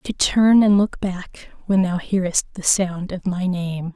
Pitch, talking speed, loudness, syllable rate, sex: 185 Hz, 195 wpm, -19 LUFS, 4.0 syllables/s, female